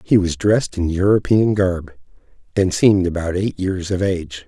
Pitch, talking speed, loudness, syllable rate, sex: 95 Hz, 175 wpm, -18 LUFS, 5.1 syllables/s, male